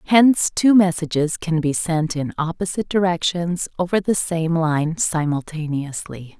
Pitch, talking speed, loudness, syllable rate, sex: 170 Hz, 130 wpm, -20 LUFS, 4.5 syllables/s, female